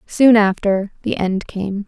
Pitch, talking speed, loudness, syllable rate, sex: 205 Hz, 160 wpm, -17 LUFS, 3.7 syllables/s, female